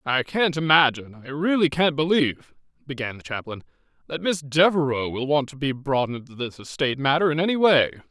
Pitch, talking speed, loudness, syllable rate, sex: 145 Hz, 185 wpm, -22 LUFS, 5.8 syllables/s, male